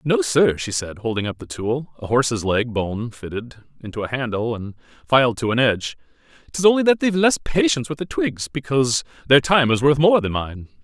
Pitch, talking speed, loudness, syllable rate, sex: 125 Hz, 200 wpm, -20 LUFS, 5.5 syllables/s, male